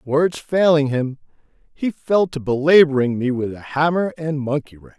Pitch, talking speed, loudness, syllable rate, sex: 145 Hz, 170 wpm, -19 LUFS, 4.6 syllables/s, male